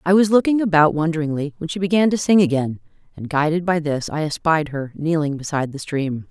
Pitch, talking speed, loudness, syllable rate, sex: 160 Hz, 210 wpm, -19 LUFS, 5.9 syllables/s, female